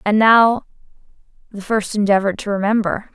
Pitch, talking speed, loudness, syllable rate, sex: 210 Hz, 135 wpm, -16 LUFS, 5.0 syllables/s, female